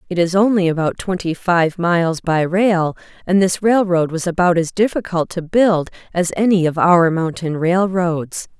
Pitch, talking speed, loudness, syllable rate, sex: 175 Hz, 170 wpm, -17 LUFS, 4.5 syllables/s, female